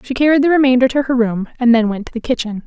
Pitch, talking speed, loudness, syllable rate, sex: 250 Hz, 295 wpm, -15 LUFS, 6.9 syllables/s, female